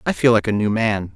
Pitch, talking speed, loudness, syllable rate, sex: 100 Hz, 315 wpm, -18 LUFS, 5.8 syllables/s, male